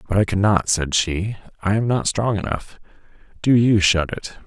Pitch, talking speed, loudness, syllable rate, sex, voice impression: 100 Hz, 190 wpm, -20 LUFS, 4.7 syllables/s, male, very masculine, middle-aged, thick, cool, sincere, calm